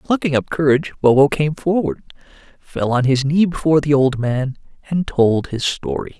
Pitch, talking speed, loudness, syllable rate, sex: 145 Hz, 175 wpm, -17 LUFS, 5.0 syllables/s, male